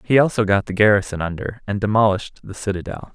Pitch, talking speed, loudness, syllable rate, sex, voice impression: 105 Hz, 190 wpm, -19 LUFS, 6.4 syllables/s, male, masculine, adult-like, relaxed, slightly weak, hard, fluent, cool, sincere, wild, slightly strict, sharp, modest